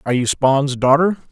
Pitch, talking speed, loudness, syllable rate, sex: 140 Hz, 185 wpm, -16 LUFS, 5.5 syllables/s, male